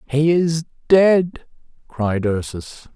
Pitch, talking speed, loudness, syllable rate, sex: 145 Hz, 100 wpm, -18 LUFS, 3.0 syllables/s, male